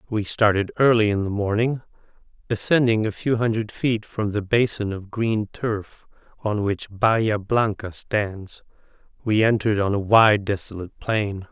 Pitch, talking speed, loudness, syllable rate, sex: 105 Hz, 150 wpm, -22 LUFS, 4.5 syllables/s, male